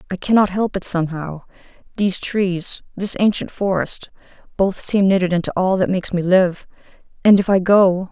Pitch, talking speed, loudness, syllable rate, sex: 190 Hz, 170 wpm, -18 LUFS, 5.2 syllables/s, female